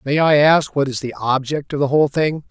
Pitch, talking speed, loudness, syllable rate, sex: 140 Hz, 265 wpm, -17 LUFS, 5.6 syllables/s, male